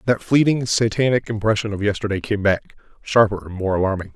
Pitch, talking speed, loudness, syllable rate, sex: 105 Hz, 160 wpm, -20 LUFS, 5.7 syllables/s, male